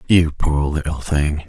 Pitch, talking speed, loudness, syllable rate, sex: 75 Hz, 160 wpm, -19 LUFS, 4.0 syllables/s, male